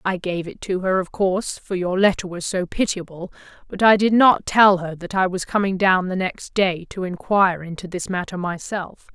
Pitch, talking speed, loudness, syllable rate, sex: 185 Hz, 215 wpm, -20 LUFS, 5.0 syllables/s, female